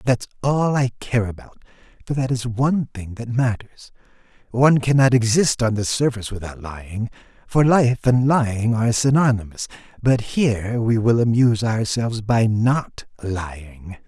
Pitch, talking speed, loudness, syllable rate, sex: 115 Hz, 150 wpm, -20 LUFS, 4.8 syllables/s, male